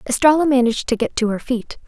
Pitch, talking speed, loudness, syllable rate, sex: 250 Hz, 225 wpm, -18 LUFS, 6.5 syllables/s, female